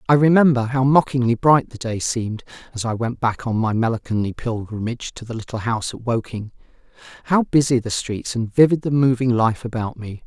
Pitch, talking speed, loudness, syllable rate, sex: 120 Hz, 195 wpm, -20 LUFS, 5.7 syllables/s, male